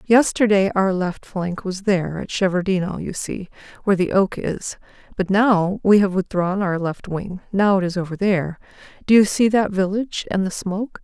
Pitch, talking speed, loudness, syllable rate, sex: 195 Hz, 185 wpm, -20 LUFS, 5.0 syllables/s, female